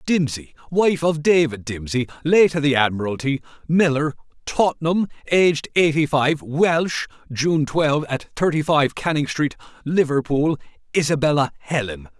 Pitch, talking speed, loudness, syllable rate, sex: 150 Hz, 120 wpm, -20 LUFS, 4.7 syllables/s, male